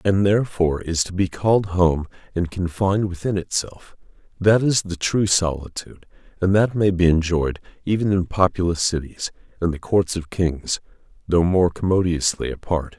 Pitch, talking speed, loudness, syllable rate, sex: 90 Hz, 155 wpm, -21 LUFS, 5.0 syllables/s, male